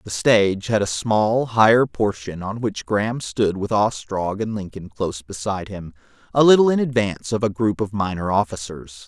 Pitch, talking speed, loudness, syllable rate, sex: 105 Hz, 185 wpm, -20 LUFS, 5.0 syllables/s, male